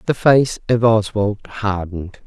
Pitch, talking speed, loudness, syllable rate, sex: 105 Hz, 130 wpm, -17 LUFS, 4.2 syllables/s, female